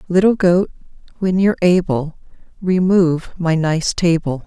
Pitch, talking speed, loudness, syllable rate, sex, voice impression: 175 Hz, 120 wpm, -17 LUFS, 4.6 syllables/s, female, feminine, very adult-like, slightly dark, calm, elegant, slightly sweet